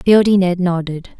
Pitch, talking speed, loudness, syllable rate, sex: 180 Hz, 150 wpm, -15 LUFS, 5.1 syllables/s, female